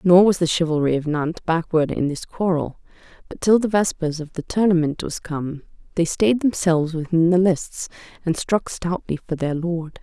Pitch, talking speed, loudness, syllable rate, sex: 170 Hz, 185 wpm, -21 LUFS, 4.9 syllables/s, female